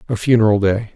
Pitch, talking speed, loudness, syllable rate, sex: 110 Hz, 190 wpm, -15 LUFS, 6.7 syllables/s, male